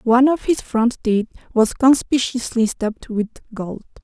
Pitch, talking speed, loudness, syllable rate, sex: 235 Hz, 150 wpm, -19 LUFS, 4.5 syllables/s, female